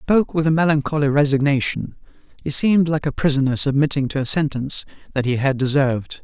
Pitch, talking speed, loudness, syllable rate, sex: 145 Hz, 175 wpm, -19 LUFS, 6.6 syllables/s, male